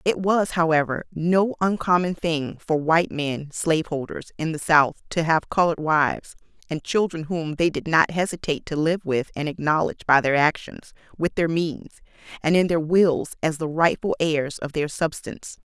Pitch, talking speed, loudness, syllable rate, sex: 160 Hz, 180 wpm, -22 LUFS, 5.0 syllables/s, female